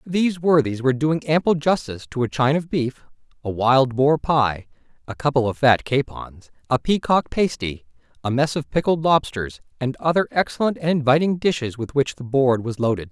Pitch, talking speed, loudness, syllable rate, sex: 140 Hz, 185 wpm, -21 LUFS, 5.3 syllables/s, male